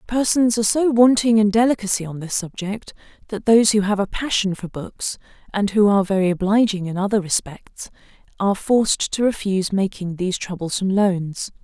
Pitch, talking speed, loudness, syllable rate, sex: 205 Hz, 170 wpm, -19 LUFS, 5.6 syllables/s, female